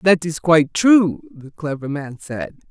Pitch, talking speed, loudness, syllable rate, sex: 170 Hz, 180 wpm, -18 LUFS, 4.1 syllables/s, female